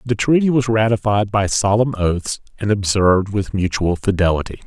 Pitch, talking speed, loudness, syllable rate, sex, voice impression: 105 Hz, 155 wpm, -18 LUFS, 5.1 syllables/s, male, very masculine, very adult-like, slightly thick, slightly muffled, cool, slightly calm, slightly wild